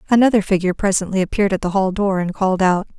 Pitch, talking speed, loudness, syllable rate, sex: 195 Hz, 220 wpm, -18 LUFS, 7.4 syllables/s, female